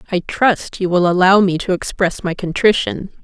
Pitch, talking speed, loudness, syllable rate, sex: 185 Hz, 185 wpm, -16 LUFS, 4.8 syllables/s, female